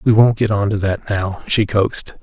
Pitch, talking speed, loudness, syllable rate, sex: 105 Hz, 245 wpm, -17 LUFS, 5.4 syllables/s, male